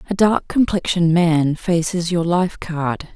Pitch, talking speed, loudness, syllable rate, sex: 170 Hz, 150 wpm, -18 LUFS, 4.1 syllables/s, female